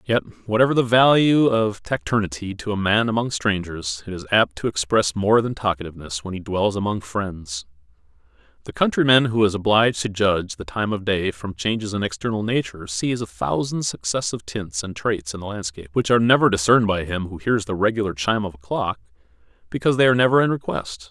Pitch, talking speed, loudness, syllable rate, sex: 105 Hz, 200 wpm, -21 LUFS, 6.0 syllables/s, male